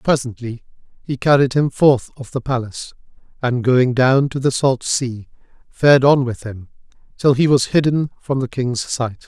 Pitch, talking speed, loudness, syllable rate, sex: 130 Hz, 175 wpm, -17 LUFS, 4.7 syllables/s, male